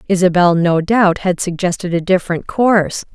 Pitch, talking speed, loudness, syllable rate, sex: 180 Hz, 155 wpm, -15 LUFS, 5.1 syllables/s, female